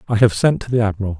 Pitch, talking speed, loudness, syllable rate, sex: 105 Hz, 300 wpm, -17 LUFS, 7.8 syllables/s, male